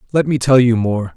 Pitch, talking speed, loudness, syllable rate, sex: 120 Hz, 260 wpm, -15 LUFS, 5.6 syllables/s, male